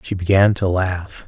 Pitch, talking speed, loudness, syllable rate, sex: 95 Hz, 190 wpm, -17 LUFS, 4.3 syllables/s, male